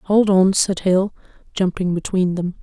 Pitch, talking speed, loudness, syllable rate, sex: 185 Hz, 160 wpm, -18 LUFS, 4.1 syllables/s, female